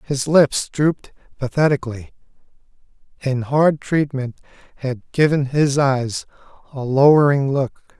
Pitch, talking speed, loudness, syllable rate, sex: 135 Hz, 105 wpm, -18 LUFS, 4.3 syllables/s, male